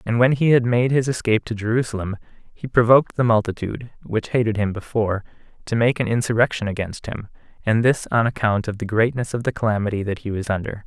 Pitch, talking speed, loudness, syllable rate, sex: 115 Hz, 205 wpm, -21 LUFS, 6.3 syllables/s, male